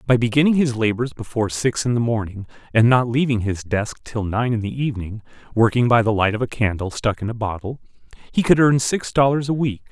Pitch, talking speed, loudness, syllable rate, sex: 120 Hz, 225 wpm, -20 LUFS, 5.8 syllables/s, male